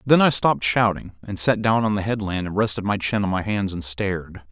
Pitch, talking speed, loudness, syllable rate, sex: 100 Hz, 255 wpm, -21 LUFS, 5.5 syllables/s, male